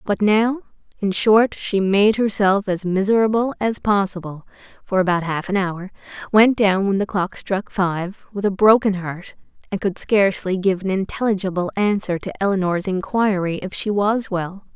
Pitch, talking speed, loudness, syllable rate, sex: 195 Hz, 165 wpm, -19 LUFS, 4.7 syllables/s, female